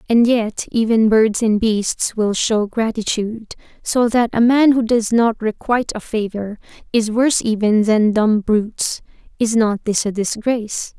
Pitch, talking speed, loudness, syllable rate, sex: 220 Hz, 165 wpm, -17 LUFS, 4.4 syllables/s, female